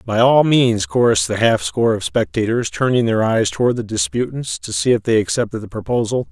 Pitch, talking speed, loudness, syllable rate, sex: 115 Hz, 210 wpm, -17 LUFS, 5.7 syllables/s, male